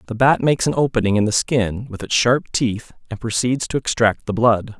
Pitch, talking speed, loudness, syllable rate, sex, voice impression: 115 Hz, 225 wpm, -19 LUFS, 5.2 syllables/s, male, very masculine, slightly middle-aged, very thick, tensed, powerful, bright, slightly soft, slightly muffled, fluent, slightly raspy, very cool, intellectual, refreshing, very sincere, calm, mature, friendly, very reassuring, unique, very elegant, slightly wild, sweet, lively, kind, slightly intense